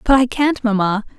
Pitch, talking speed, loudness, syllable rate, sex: 235 Hz, 205 wpm, -17 LUFS, 5.2 syllables/s, female